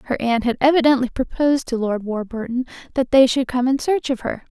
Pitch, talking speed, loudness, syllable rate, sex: 255 Hz, 210 wpm, -19 LUFS, 5.9 syllables/s, female